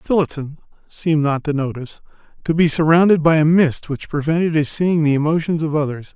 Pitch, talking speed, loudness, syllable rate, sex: 155 Hz, 185 wpm, -17 LUFS, 5.7 syllables/s, male